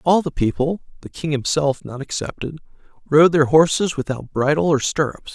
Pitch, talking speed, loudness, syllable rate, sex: 155 Hz, 170 wpm, -19 LUFS, 5.0 syllables/s, male